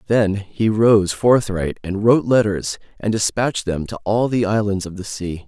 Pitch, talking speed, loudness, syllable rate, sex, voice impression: 105 Hz, 185 wpm, -19 LUFS, 4.6 syllables/s, male, masculine, adult-like, thick, tensed, slightly powerful, bright, clear, slightly nasal, cool, intellectual, calm, friendly, wild, lively, kind